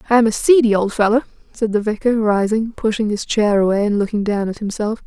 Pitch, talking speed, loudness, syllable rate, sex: 215 Hz, 225 wpm, -17 LUFS, 6.0 syllables/s, female